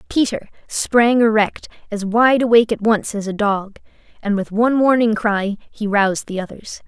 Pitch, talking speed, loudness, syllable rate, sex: 215 Hz, 175 wpm, -17 LUFS, 4.9 syllables/s, female